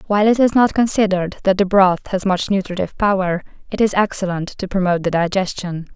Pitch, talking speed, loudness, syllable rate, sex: 190 Hz, 190 wpm, -18 LUFS, 6.1 syllables/s, female